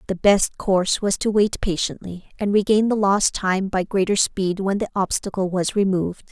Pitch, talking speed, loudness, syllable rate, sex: 195 Hz, 190 wpm, -21 LUFS, 4.9 syllables/s, female